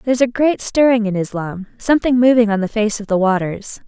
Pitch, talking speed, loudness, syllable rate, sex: 225 Hz, 215 wpm, -16 LUFS, 5.8 syllables/s, female